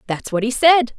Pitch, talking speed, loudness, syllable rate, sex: 250 Hz, 245 wpm, -16 LUFS, 4.9 syllables/s, female